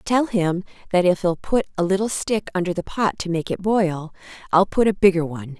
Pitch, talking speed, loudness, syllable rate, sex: 185 Hz, 225 wpm, -21 LUFS, 5.4 syllables/s, female